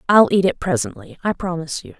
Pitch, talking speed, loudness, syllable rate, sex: 185 Hz, 210 wpm, -19 LUFS, 6.5 syllables/s, female